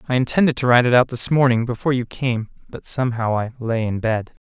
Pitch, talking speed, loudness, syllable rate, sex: 120 Hz, 230 wpm, -19 LUFS, 6.4 syllables/s, male